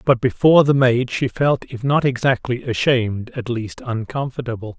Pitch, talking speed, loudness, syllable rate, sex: 125 Hz, 165 wpm, -19 LUFS, 4.9 syllables/s, male